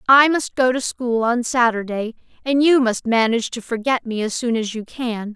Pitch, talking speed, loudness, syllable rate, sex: 240 Hz, 215 wpm, -19 LUFS, 4.9 syllables/s, female